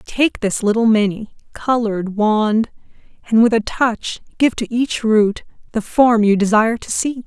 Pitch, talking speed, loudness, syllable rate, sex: 225 Hz, 165 wpm, -17 LUFS, 4.4 syllables/s, female